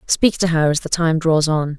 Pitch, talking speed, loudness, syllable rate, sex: 160 Hz, 270 wpm, -17 LUFS, 4.9 syllables/s, female